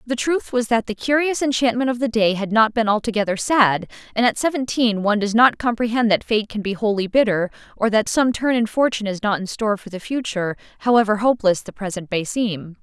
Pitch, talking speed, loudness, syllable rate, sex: 220 Hz, 220 wpm, -20 LUFS, 5.9 syllables/s, female